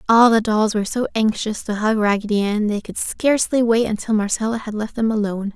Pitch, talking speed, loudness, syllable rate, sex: 220 Hz, 215 wpm, -19 LUFS, 5.9 syllables/s, female